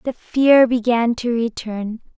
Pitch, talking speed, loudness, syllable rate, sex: 235 Hz, 135 wpm, -18 LUFS, 3.7 syllables/s, female